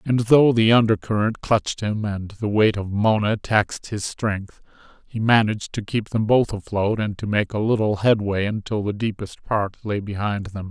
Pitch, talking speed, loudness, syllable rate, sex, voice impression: 105 Hz, 195 wpm, -21 LUFS, 4.8 syllables/s, male, very masculine, very adult-like, slightly old, very thick, slightly tensed, slightly weak, slightly bright, slightly hard, slightly muffled, slightly fluent, slightly cool, intellectual, very sincere, very calm, mature, slightly friendly, slightly reassuring, slightly unique, very elegant, very kind, very modest